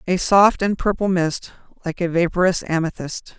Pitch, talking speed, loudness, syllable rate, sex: 180 Hz, 160 wpm, -19 LUFS, 4.8 syllables/s, female